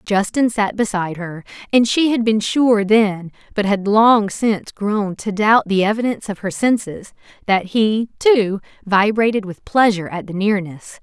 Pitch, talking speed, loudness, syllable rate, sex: 210 Hz, 170 wpm, -17 LUFS, 4.5 syllables/s, female